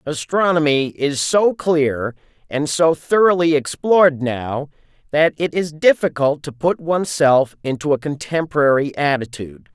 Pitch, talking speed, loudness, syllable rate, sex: 150 Hz, 125 wpm, -18 LUFS, 4.5 syllables/s, male